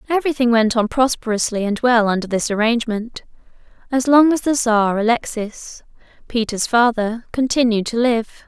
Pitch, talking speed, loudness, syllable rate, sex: 235 Hz, 150 wpm, -18 LUFS, 5.0 syllables/s, female